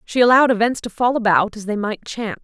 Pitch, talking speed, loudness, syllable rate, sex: 220 Hz, 245 wpm, -18 LUFS, 6.4 syllables/s, female